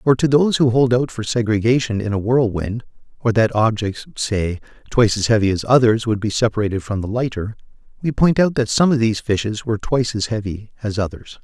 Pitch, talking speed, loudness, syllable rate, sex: 115 Hz, 210 wpm, -18 LUFS, 5.9 syllables/s, male